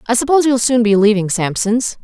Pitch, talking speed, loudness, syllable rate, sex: 230 Hz, 205 wpm, -14 LUFS, 6.0 syllables/s, female